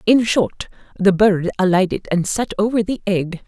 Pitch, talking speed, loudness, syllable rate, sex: 195 Hz, 175 wpm, -18 LUFS, 4.5 syllables/s, female